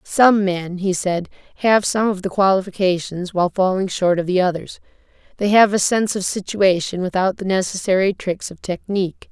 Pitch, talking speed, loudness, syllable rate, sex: 190 Hz, 175 wpm, -19 LUFS, 5.2 syllables/s, female